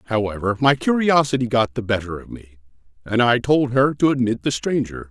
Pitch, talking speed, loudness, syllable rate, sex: 120 Hz, 190 wpm, -19 LUFS, 5.5 syllables/s, male